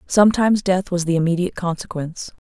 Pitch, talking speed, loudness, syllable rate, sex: 180 Hz, 145 wpm, -19 LUFS, 6.8 syllables/s, female